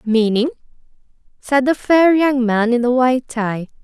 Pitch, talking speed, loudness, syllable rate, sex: 250 Hz, 155 wpm, -16 LUFS, 3.3 syllables/s, female